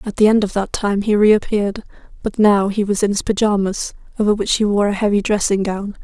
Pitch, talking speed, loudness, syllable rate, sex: 205 Hz, 230 wpm, -17 LUFS, 5.7 syllables/s, female